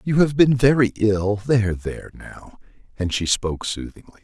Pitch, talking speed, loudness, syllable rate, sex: 110 Hz, 170 wpm, -20 LUFS, 4.9 syllables/s, male